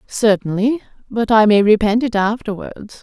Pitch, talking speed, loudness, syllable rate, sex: 220 Hz, 140 wpm, -16 LUFS, 4.6 syllables/s, female